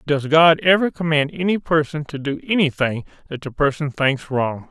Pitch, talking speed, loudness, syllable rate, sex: 150 Hz, 180 wpm, -19 LUFS, 4.9 syllables/s, male